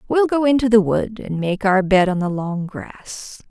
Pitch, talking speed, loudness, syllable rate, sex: 205 Hz, 225 wpm, -18 LUFS, 4.3 syllables/s, female